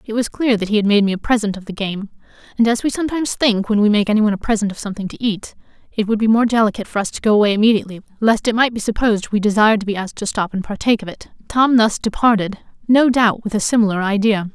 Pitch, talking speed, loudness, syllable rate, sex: 215 Hz, 265 wpm, -17 LUFS, 7.2 syllables/s, female